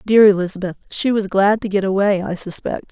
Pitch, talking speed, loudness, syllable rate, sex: 195 Hz, 205 wpm, -18 LUFS, 5.7 syllables/s, female